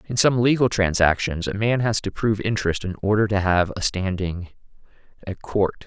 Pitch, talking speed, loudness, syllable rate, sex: 100 Hz, 185 wpm, -21 LUFS, 5.3 syllables/s, male